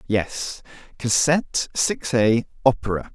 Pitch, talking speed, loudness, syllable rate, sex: 120 Hz, 75 wpm, -22 LUFS, 3.8 syllables/s, male